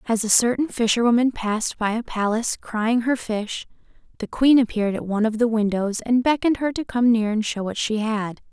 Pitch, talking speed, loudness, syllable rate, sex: 230 Hz, 210 wpm, -21 LUFS, 5.6 syllables/s, female